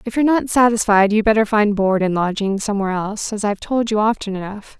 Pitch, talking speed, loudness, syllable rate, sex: 210 Hz, 225 wpm, -18 LUFS, 6.4 syllables/s, female